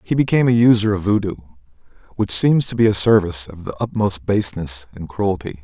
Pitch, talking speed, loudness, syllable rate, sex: 100 Hz, 190 wpm, -18 LUFS, 5.8 syllables/s, male